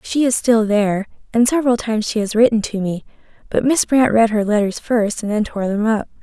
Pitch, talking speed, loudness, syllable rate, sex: 220 Hz, 230 wpm, -17 LUFS, 5.7 syllables/s, female